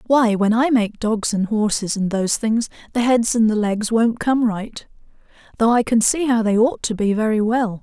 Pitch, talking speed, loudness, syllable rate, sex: 225 Hz, 220 wpm, -19 LUFS, 4.8 syllables/s, female